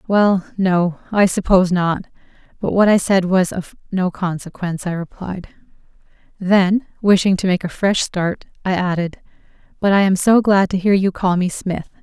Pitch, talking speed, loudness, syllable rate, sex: 185 Hz, 175 wpm, -17 LUFS, 4.7 syllables/s, female